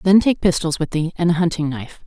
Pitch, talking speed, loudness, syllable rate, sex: 165 Hz, 260 wpm, -19 LUFS, 6.2 syllables/s, female